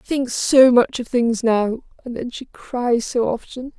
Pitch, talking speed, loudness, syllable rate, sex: 240 Hz, 205 wpm, -18 LUFS, 4.1 syllables/s, female